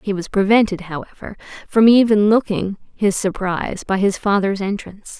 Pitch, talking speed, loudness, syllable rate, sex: 200 Hz, 150 wpm, -17 LUFS, 5.2 syllables/s, female